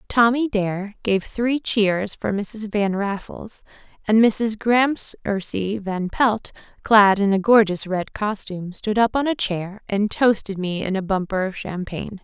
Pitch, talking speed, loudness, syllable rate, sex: 205 Hz, 160 wpm, -21 LUFS, 4.0 syllables/s, female